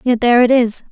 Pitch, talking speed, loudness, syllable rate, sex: 240 Hz, 265 wpm, -13 LUFS, 6.5 syllables/s, female